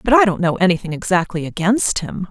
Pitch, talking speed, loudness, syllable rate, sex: 190 Hz, 210 wpm, -17 LUFS, 5.9 syllables/s, female